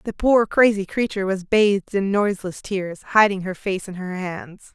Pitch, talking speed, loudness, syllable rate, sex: 195 Hz, 190 wpm, -21 LUFS, 4.9 syllables/s, female